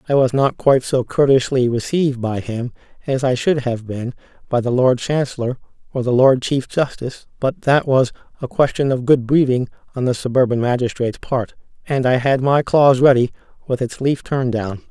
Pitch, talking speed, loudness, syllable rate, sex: 130 Hz, 190 wpm, -18 LUFS, 5.3 syllables/s, male